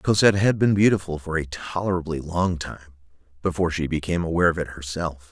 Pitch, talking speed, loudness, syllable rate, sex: 85 Hz, 180 wpm, -23 LUFS, 6.5 syllables/s, male